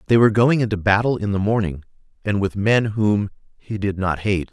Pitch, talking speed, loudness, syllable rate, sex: 105 Hz, 200 wpm, -19 LUFS, 5.5 syllables/s, male